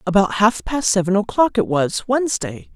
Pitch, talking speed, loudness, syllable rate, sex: 205 Hz, 150 wpm, -18 LUFS, 4.9 syllables/s, female